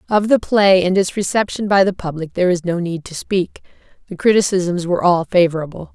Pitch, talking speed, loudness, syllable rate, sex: 185 Hz, 200 wpm, -17 LUFS, 5.7 syllables/s, female